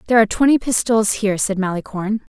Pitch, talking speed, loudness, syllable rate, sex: 215 Hz, 180 wpm, -18 LUFS, 7.7 syllables/s, female